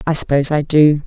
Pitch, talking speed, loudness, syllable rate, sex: 145 Hz, 225 wpm, -14 LUFS, 6.6 syllables/s, female